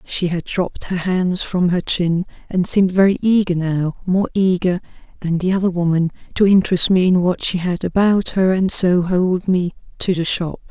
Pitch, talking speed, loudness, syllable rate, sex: 180 Hz, 195 wpm, -18 LUFS, 4.8 syllables/s, female